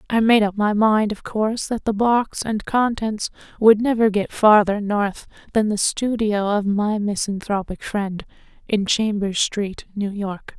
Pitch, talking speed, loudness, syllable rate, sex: 210 Hz, 165 wpm, -20 LUFS, 4.1 syllables/s, female